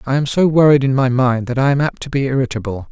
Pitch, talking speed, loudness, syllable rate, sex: 130 Hz, 290 wpm, -16 LUFS, 6.5 syllables/s, male